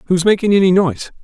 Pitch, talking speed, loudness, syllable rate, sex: 185 Hz, 195 wpm, -14 LUFS, 7.3 syllables/s, male